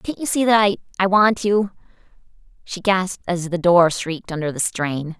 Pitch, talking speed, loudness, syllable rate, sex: 185 Hz, 185 wpm, -19 LUFS, 5.0 syllables/s, female